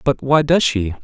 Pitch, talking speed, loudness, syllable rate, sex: 135 Hz, 230 wpm, -16 LUFS, 4.6 syllables/s, male